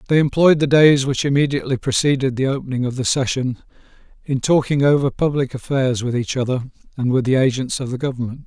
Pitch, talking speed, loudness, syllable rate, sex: 135 Hz, 190 wpm, -18 LUFS, 6.1 syllables/s, male